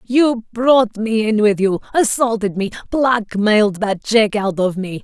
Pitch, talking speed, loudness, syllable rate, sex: 215 Hz, 165 wpm, -16 LUFS, 4.2 syllables/s, female